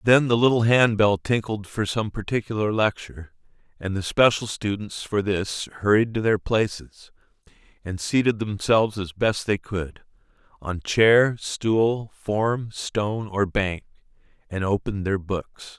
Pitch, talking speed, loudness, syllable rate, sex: 105 Hz, 135 wpm, -23 LUFS, 4.2 syllables/s, male